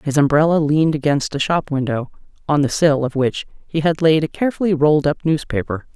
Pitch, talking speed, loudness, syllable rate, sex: 150 Hz, 200 wpm, -18 LUFS, 5.8 syllables/s, female